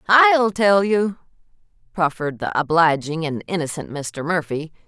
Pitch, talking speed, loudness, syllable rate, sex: 175 Hz, 125 wpm, -20 LUFS, 4.4 syllables/s, female